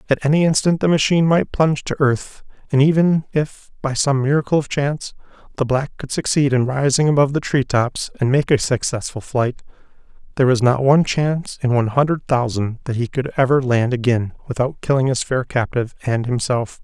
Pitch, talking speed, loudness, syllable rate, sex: 135 Hz, 190 wpm, -18 LUFS, 5.7 syllables/s, male